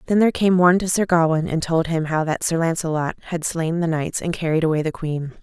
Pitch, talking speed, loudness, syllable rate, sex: 165 Hz, 255 wpm, -20 LUFS, 6.0 syllables/s, female